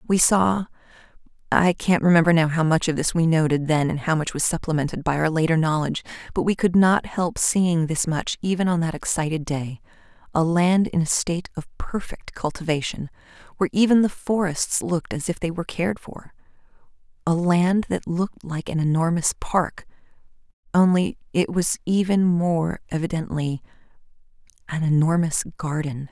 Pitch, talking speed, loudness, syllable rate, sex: 165 Hz, 160 wpm, -22 LUFS, 5.2 syllables/s, female